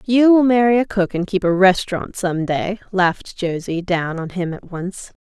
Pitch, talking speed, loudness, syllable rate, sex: 190 Hz, 205 wpm, -18 LUFS, 4.7 syllables/s, female